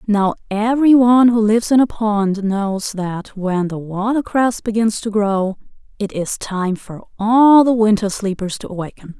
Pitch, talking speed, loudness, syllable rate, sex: 210 Hz, 170 wpm, -17 LUFS, 4.5 syllables/s, female